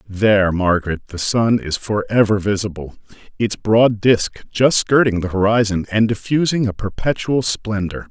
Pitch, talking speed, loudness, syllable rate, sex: 105 Hz, 140 wpm, -17 LUFS, 4.7 syllables/s, male